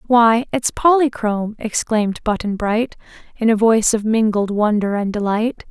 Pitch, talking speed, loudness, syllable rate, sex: 220 Hz, 145 wpm, -17 LUFS, 4.8 syllables/s, female